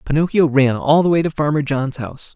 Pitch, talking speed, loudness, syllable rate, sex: 145 Hz, 230 wpm, -17 LUFS, 5.8 syllables/s, male